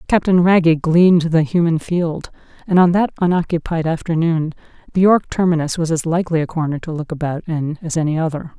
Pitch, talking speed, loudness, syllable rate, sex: 165 Hz, 180 wpm, -17 LUFS, 5.7 syllables/s, female